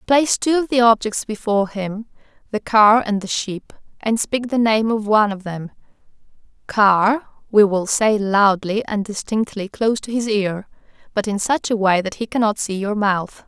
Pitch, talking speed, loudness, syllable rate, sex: 215 Hz, 185 wpm, -18 LUFS, 4.7 syllables/s, female